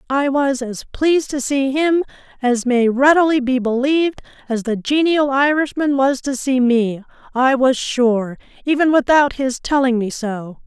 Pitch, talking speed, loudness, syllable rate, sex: 265 Hz, 165 wpm, -17 LUFS, 4.4 syllables/s, female